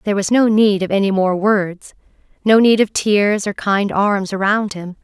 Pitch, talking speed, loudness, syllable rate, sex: 200 Hz, 205 wpm, -16 LUFS, 4.6 syllables/s, female